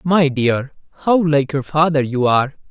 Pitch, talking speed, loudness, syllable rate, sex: 145 Hz, 175 wpm, -17 LUFS, 4.7 syllables/s, male